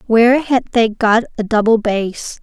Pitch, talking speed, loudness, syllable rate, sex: 225 Hz, 175 wpm, -15 LUFS, 4.3 syllables/s, female